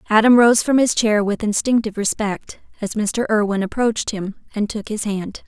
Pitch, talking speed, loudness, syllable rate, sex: 215 Hz, 185 wpm, -19 LUFS, 5.3 syllables/s, female